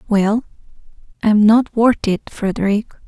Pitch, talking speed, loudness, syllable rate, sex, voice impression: 215 Hz, 115 wpm, -16 LUFS, 4.2 syllables/s, female, very feminine, young, very thin, slightly relaxed, slightly weak, slightly dark, slightly hard, clear, fluent, very cute, intellectual, refreshing, sincere, very calm, very friendly, very reassuring, slightly unique, very elegant, very sweet, very kind, modest